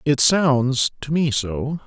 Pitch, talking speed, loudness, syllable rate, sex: 135 Hz, 160 wpm, -19 LUFS, 3.1 syllables/s, male